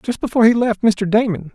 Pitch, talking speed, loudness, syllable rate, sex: 220 Hz, 235 wpm, -16 LUFS, 6.0 syllables/s, male